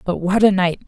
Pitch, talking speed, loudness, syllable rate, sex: 190 Hz, 275 wpm, -17 LUFS, 5.5 syllables/s, female